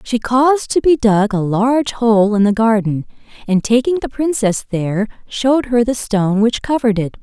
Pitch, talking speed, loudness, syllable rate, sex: 225 Hz, 190 wpm, -15 LUFS, 5.2 syllables/s, female